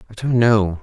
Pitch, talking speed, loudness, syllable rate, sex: 105 Hz, 220 wpm, -17 LUFS, 4.9 syllables/s, male